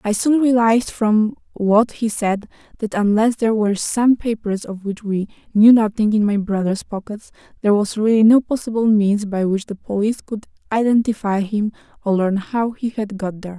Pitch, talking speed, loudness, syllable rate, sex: 215 Hz, 185 wpm, -18 LUFS, 5.1 syllables/s, female